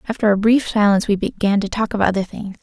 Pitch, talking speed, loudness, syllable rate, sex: 205 Hz, 250 wpm, -18 LUFS, 6.6 syllables/s, female